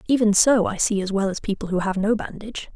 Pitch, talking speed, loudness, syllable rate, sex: 205 Hz, 260 wpm, -21 LUFS, 6.2 syllables/s, female